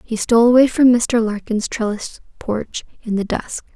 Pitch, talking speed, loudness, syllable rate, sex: 230 Hz, 175 wpm, -17 LUFS, 5.0 syllables/s, female